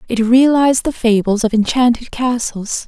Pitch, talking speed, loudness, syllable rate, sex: 240 Hz, 145 wpm, -14 LUFS, 4.8 syllables/s, female